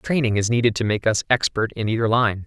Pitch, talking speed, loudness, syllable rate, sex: 115 Hz, 245 wpm, -20 LUFS, 5.9 syllables/s, male